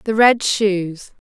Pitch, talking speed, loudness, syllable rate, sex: 205 Hz, 135 wpm, -16 LUFS, 2.9 syllables/s, female